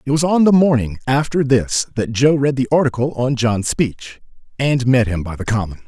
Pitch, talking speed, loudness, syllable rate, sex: 125 Hz, 215 wpm, -17 LUFS, 5.1 syllables/s, male